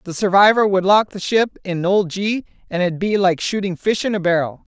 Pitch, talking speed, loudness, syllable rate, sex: 190 Hz, 225 wpm, -18 LUFS, 5.2 syllables/s, female